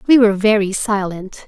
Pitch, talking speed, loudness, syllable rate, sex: 205 Hz, 165 wpm, -16 LUFS, 5.3 syllables/s, female